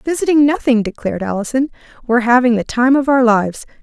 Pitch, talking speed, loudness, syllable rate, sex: 245 Hz, 175 wpm, -15 LUFS, 6.4 syllables/s, female